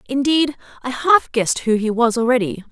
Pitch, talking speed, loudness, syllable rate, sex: 245 Hz, 175 wpm, -17 LUFS, 5.3 syllables/s, female